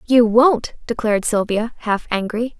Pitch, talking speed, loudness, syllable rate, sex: 225 Hz, 140 wpm, -18 LUFS, 4.9 syllables/s, female